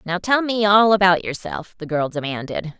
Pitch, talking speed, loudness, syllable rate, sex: 185 Hz, 195 wpm, -19 LUFS, 4.9 syllables/s, female